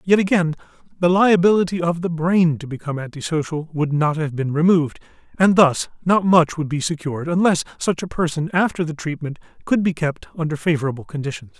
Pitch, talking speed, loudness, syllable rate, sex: 165 Hz, 180 wpm, -20 LUFS, 5.8 syllables/s, male